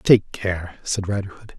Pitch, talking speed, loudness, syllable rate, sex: 95 Hz, 150 wpm, -23 LUFS, 4.0 syllables/s, male